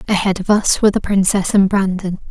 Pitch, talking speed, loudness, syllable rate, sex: 195 Hz, 210 wpm, -15 LUFS, 5.8 syllables/s, female